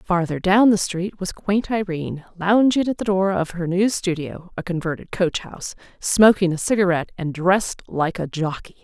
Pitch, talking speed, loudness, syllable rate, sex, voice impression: 185 Hz, 185 wpm, -21 LUFS, 4.5 syllables/s, female, very feminine, very middle-aged, very thin, tensed, powerful, bright, slightly hard, very clear, fluent, raspy, slightly cool, intellectual, slightly sincere, slightly calm, slightly friendly, slightly reassuring, very unique, slightly elegant, slightly wild, slightly sweet, very lively, very strict, intense, very sharp, light